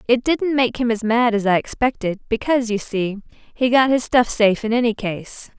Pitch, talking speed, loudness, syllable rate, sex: 230 Hz, 215 wpm, -19 LUFS, 5.1 syllables/s, female